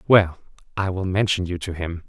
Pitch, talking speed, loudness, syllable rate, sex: 90 Hz, 200 wpm, -23 LUFS, 5.2 syllables/s, male